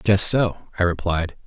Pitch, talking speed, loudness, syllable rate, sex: 90 Hz, 165 wpm, -20 LUFS, 4.1 syllables/s, male